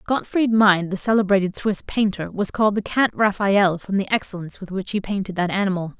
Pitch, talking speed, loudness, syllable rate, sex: 200 Hz, 200 wpm, -21 LUFS, 5.7 syllables/s, female